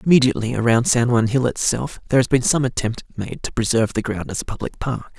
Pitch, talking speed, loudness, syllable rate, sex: 120 Hz, 230 wpm, -20 LUFS, 6.5 syllables/s, male